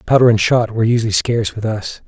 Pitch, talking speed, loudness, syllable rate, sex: 115 Hz, 230 wpm, -16 LUFS, 6.8 syllables/s, male